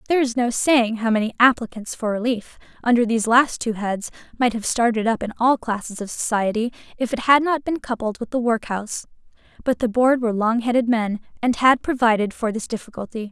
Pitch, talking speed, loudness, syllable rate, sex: 235 Hz, 205 wpm, -21 LUFS, 5.8 syllables/s, female